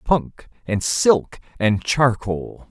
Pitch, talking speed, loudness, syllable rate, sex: 120 Hz, 110 wpm, -20 LUFS, 2.7 syllables/s, male